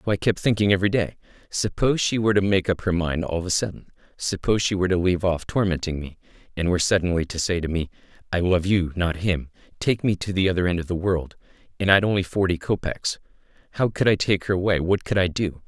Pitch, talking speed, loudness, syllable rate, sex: 95 Hz, 235 wpm, -23 LUFS, 6.5 syllables/s, male